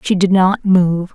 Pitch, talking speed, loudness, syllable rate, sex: 185 Hz, 210 wpm, -14 LUFS, 3.8 syllables/s, female